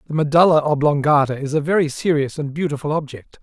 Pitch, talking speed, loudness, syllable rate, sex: 150 Hz, 175 wpm, -18 LUFS, 6.2 syllables/s, male